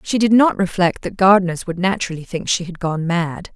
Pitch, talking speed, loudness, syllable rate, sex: 185 Hz, 220 wpm, -18 LUFS, 5.5 syllables/s, female